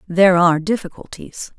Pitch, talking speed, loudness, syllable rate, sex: 180 Hz, 115 wpm, -15 LUFS, 5.7 syllables/s, female